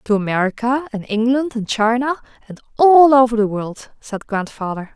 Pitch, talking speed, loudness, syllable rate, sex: 235 Hz, 160 wpm, -17 LUFS, 4.9 syllables/s, female